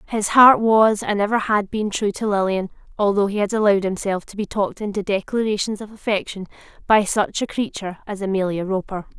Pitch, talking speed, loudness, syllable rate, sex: 205 Hz, 190 wpm, -20 LUFS, 5.7 syllables/s, female